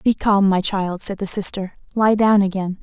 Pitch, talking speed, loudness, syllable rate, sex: 195 Hz, 210 wpm, -18 LUFS, 4.6 syllables/s, female